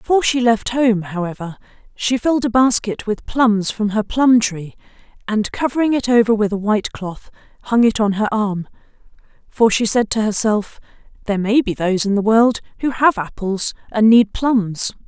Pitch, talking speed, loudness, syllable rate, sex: 220 Hz, 185 wpm, -17 LUFS, 5.0 syllables/s, female